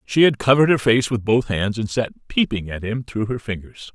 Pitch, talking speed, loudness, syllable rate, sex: 115 Hz, 245 wpm, -20 LUFS, 5.3 syllables/s, male